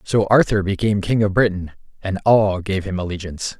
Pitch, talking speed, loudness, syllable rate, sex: 100 Hz, 185 wpm, -19 LUFS, 5.7 syllables/s, male